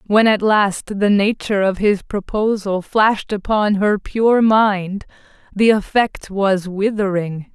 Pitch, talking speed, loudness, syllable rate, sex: 205 Hz, 135 wpm, -17 LUFS, 3.8 syllables/s, female